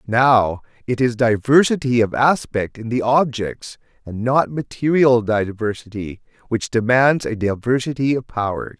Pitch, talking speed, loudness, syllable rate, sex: 120 Hz, 130 wpm, -18 LUFS, 4.3 syllables/s, male